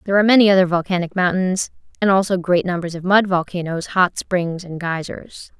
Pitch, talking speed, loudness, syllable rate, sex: 180 Hz, 180 wpm, -18 LUFS, 5.7 syllables/s, female